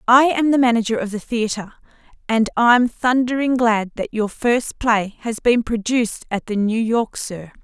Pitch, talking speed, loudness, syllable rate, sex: 230 Hz, 180 wpm, -19 LUFS, 4.5 syllables/s, female